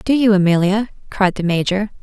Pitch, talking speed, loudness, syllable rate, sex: 200 Hz, 180 wpm, -16 LUFS, 5.5 syllables/s, female